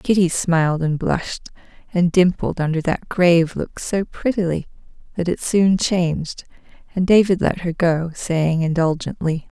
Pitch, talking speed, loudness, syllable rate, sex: 175 Hz, 145 wpm, -19 LUFS, 4.5 syllables/s, female